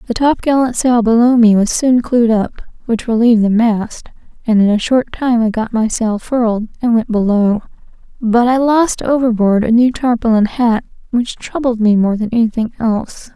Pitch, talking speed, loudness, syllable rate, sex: 230 Hz, 190 wpm, -14 LUFS, 5.0 syllables/s, female